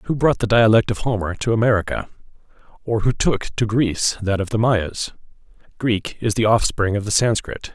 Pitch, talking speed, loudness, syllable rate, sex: 110 Hz, 185 wpm, -20 LUFS, 5.2 syllables/s, male